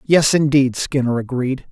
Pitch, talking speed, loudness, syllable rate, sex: 135 Hz, 140 wpm, -17 LUFS, 4.4 syllables/s, male